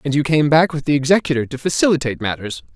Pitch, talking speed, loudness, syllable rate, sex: 145 Hz, 220 wpm, -17 LUFS, 7.0 syllables/s, male